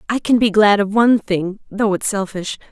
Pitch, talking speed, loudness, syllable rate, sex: 205 Hz, 220 wpm, -17 LUFS, 5.2 syllables/s, female